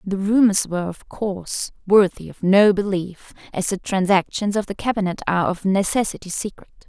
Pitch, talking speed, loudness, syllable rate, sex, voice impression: 195 Hz, 165 wpm, -20 LUFS, 5.3 syllables/s, female, very feminine, slightly young, slightly adult-like, very thin, tensed, slightly weak, slightly bright, slightly soft, slightly muffled, fluent, slightly raspy, very cute, intellectual, very refreshing, sincere, calm, very friendly, very reassuring, unique, very elegant, slightly wild, sweet, lively, kind, slightly sharp, slightly modest, light